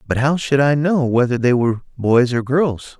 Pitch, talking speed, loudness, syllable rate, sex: 130 Hz, 220 wpm, -17 LUFS, 5.0 syllables/s, male